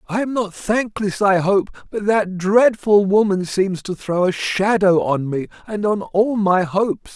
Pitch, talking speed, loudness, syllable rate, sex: 195 Hz, 185 wpm, -18 LUFS, 4.0 syllables/s, male